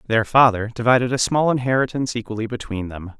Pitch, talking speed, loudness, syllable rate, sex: 115 Hz, 170 wpm, -19 LUFS, 6.3 syllables/s, male